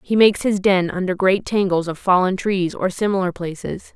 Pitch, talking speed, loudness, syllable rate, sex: 190 Hz, 195 wpm, -19 LUFS, 5.2 syllables/s, female